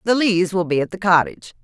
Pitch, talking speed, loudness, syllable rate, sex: 180 Hz, 255 wpm, -18 LUFS, 6.3 syllables/s, female